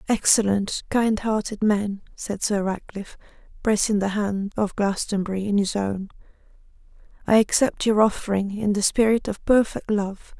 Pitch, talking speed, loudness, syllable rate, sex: 205 Hz, 145 wpm, -23 LUFS, 4.7 syllables/s, female